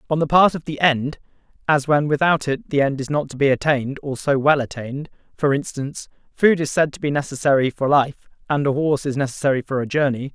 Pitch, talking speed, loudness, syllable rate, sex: 140 Hz, 225 wpm, -20 LUFS, 6.1 syllables/s, male